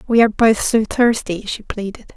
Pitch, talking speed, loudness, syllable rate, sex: 215 Hz, 195 wpm, -17 LUFS, 5.1 syllables/s, female